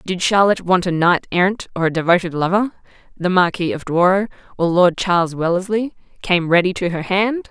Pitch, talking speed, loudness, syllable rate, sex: 185 Hz, 185 wpm, -17 LUFS, 5.5 syllables/s, female